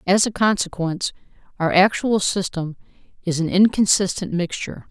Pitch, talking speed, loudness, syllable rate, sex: 185 Hz, 120 wpm, -20 LUFS, 5.2 syllables/s, female